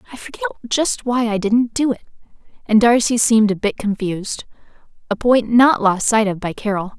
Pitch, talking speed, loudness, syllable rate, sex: 225 Hz, 190 wpm, -17 LUFS, 5.4 syllables/s, female